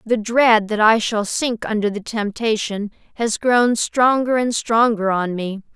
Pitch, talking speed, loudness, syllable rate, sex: 220 Hz, 165 wpm, -18 LUFS, 4.1 syllables/s, female